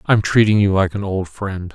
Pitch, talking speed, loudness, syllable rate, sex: 100 Hz, 275 wpm, -17 LUFS, 5.5 syllables/s, male